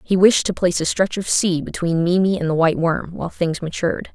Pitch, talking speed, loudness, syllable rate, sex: 175 Hz, 245 wpm, -19 LUFS, 6.0 syllables/s, female